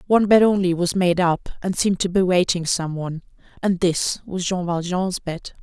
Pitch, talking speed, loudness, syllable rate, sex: 180 Hz, 205 wpm, -21 LUFS, 5.1 syllables/s, female